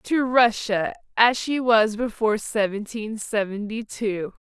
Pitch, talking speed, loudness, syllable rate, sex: 220 Hz, 120 wpm, -23 LUFS, 3.9 syllables/s, female